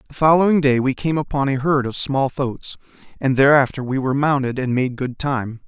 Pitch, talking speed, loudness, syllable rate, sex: 135 Hz, 210 wpm, -19 LUFS, 5.4 syllables/s, male